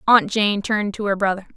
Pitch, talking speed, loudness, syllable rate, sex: 205 Hz, 230 wpm, -20 LUFS, 6.0 syllables/s, female